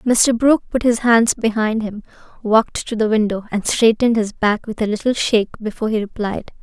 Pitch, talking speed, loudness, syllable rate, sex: 220 Hz, 200 wpm, -17 LUFS, 5.5 syllables/s, female